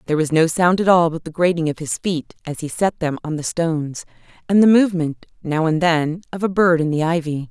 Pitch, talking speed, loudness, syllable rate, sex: 165 Hz, 250 wpm, -19 LUFS, 5.7 syllables/s, female